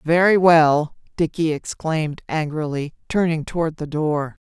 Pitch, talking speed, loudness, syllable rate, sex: 160 Hz, 120 wpm, -20 LUFS, 4.3 syllables/s, female